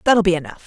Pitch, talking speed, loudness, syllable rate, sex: 195 Hz, 270 wpm, -18 LUFS, 7.7 syllables/s, female